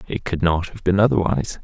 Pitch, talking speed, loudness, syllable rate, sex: 95 Hz, 220 wpm, -20 LUFS, 6.2 syllables/s, male